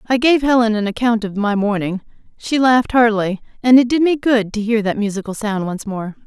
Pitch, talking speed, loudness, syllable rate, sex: 225 Hz, 220 wpm, -17 LUFS, 5.6 syllables/s, female